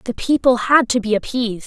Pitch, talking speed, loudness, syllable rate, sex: 235 Hz, 215 wpm, -17 LUFS, 5.7 syllables/s, female